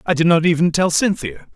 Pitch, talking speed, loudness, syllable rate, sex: 165 Hz, 230 wpm, -16 LUFS, 5.8 syllables/s, male